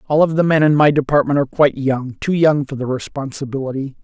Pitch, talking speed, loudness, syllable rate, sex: 140 Hz, 210 wpm, -17 LUFS, 6.2 syllables/s, male